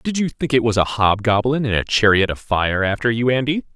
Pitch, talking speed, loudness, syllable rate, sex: 115 Hz, 255 wpm, -18 LUFS, 5.5 syllables/s, male